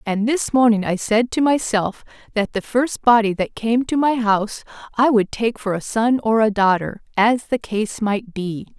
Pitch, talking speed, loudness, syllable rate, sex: 220 Hz, 200 wpm, -19 LUFS, 4.5 syllables/s, female